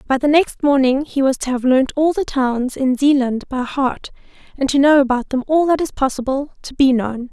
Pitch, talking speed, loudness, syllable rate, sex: 270 Hz, 230 wpm, -17 LUFS, 5.1 syllables/s, female